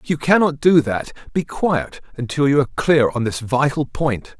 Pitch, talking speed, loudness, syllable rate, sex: 140 Hz, 205 wpm, -18 LUFS, 4.8 syllables/s, male